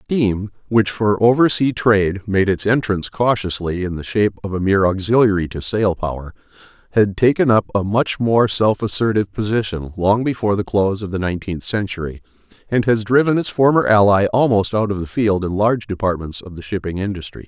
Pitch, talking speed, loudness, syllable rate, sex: 105 Hz, 185 wpm, -18 LUFS, 5.6 syllables/s, male